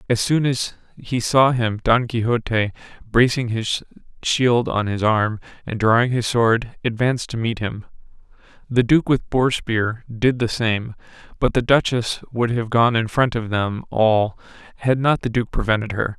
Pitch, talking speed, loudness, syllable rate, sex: 115 Hz, 175 wpm, -20 LUFS, 4.3 syllables/s, male